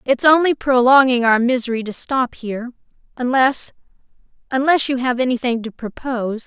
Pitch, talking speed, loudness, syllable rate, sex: 250 Hz, 130 wpm, -17 LUFS, 5.3 syllables/s, female